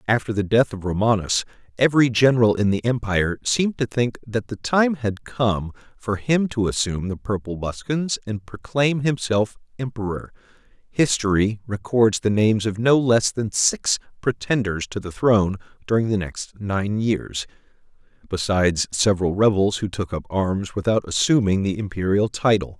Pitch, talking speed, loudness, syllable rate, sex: 110 Hz, 155 wpm, -21 LUFS, 4.9 syllables/s, male